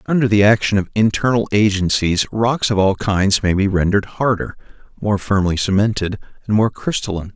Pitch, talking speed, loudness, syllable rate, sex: 100 Hz, 165 wpm, -17 LUFS, 5.5 syllables/s, male